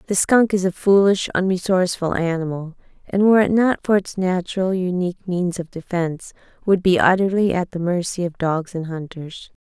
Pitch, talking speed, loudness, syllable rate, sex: 180 Hz, 175 wpm, -19 LUFS, 5.3 syllables/s, female